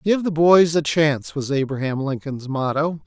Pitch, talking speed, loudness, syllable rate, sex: 150 Hz, 175 wpm, -20 LUFS, 4.8 syllables/s, male